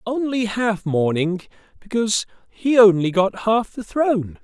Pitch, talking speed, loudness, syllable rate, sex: 210 Hz, 135 wpm, -19 LUFS, 4.4 syllables/s, male